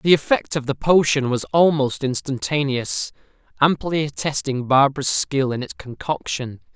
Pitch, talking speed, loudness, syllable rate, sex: 135 Hz, 135 wpm, -20 LUFS, 4.6 syllables/s, male